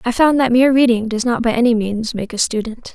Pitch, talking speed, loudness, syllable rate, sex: 235 Hz, 265 wpm, -16 LUFS, 6.0 syllables/s, female